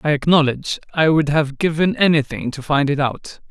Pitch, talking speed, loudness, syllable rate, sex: 150 Hz, 190 wpm, -18 LUFS, 5.3 syllables/s, male